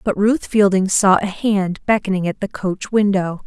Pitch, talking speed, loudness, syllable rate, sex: 195 Hz, 190 wpm, -17 LUFS, 4.5 syllables/s, female